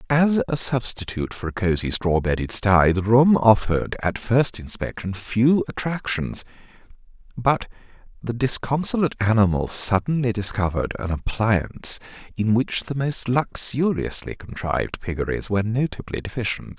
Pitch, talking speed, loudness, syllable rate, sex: 115 Hz, 125 wpm, -22 LUFS, 4.8 syllables/s, male